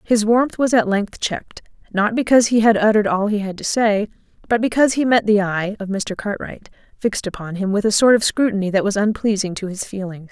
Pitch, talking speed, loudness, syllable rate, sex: 210 Hz, 225 wpm, -18 LUFS, 5.9 syllables/s, female